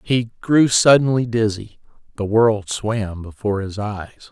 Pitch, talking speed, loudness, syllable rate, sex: 110 Hz, 140 wpm, -18 LUFS, 4.0 syllables/s, male